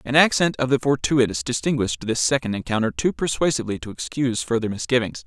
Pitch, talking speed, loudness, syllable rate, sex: 120 Hz, 170 wpm, -22 LUFS, 6.4 syllables/s, male